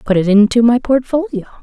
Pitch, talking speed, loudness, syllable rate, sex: 235 Hz, 185 wpm, -13 LUFS, 5.8 syllables/s, female